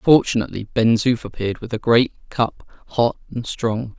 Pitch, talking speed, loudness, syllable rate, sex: 115 Hz, 165 wpm, -20 LUFS, 5.0 syllables/s, male